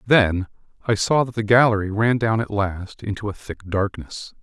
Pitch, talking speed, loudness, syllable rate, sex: 105 Hz, 190 wpm, -21 LUFS, 4.6 syllables/s, male